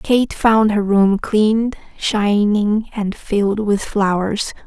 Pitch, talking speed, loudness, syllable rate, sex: 210 Hz, 130 wpm, -17 LUFS, 3.3 syllables/s, female